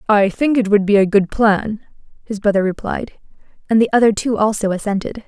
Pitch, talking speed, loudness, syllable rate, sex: 210 Hz, 195 wpm, -16 LUFS, 5.5 syllables/s, female